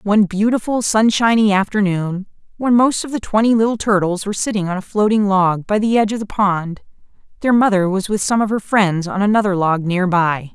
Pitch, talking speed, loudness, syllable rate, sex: 200 Hz, 205 wpm, -16 LUFS, 5.5 syllables/s, female